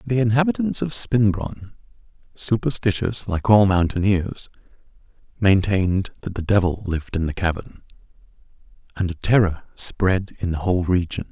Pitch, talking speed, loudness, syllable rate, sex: 100 Hz, 125 wpm, -21 LUFS, 4.9 syllables/s, male